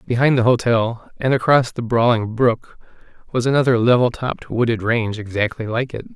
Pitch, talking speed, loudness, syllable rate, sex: 120 Hz, 165 wpm, -18 LUFS, 5.4 syllables/s, male